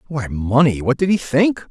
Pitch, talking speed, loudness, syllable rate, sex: 140 Hz, 210 wpm, -17 LUFS, 4.6 syllables/s, male